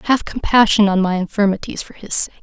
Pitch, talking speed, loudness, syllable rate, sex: 205 Hz, 200 wpm, -16 LUFS, 6.0 syllables/s, female